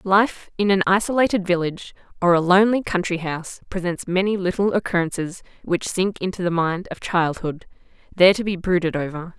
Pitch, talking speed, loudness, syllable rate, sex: 180 Hz, 165 wpm, -21 LUFS, 5.6 syllables/s, female